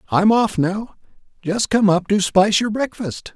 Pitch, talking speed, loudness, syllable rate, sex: 205 Hz, 160 wpm, -18 LUFS, 4.5 syllables/s, male